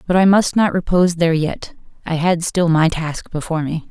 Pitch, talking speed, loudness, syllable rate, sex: 170 Hz, 215 wpm, -17 LUFS, 5.5 syllables/s, female